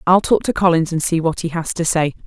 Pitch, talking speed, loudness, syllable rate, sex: 170 Hz, 290 wpm, -17 LUFS, 5.8 syllables/s, female